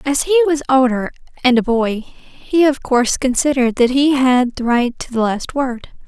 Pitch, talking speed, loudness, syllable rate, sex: 260 Hz, 200 wpm, -16 LUFS, 4.8 syllables/s, female